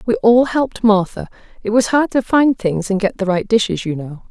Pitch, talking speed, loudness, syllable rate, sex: 215 Hz, 235 wpm, -16 LUFS, 5.2 syllables/s, female